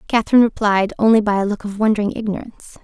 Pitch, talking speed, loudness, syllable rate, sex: 210 Hz, 190 wpm, -17 LUFS, 7.3 syllables/s, female